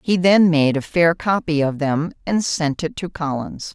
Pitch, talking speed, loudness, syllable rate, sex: 165 Hz, 210 wpm, -19 LUFS, 4.3 syllables/s, female